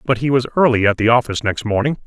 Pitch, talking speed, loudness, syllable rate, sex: 120 Hz, 260 wpm, -16 LUFS, 7.1 syllables/s, male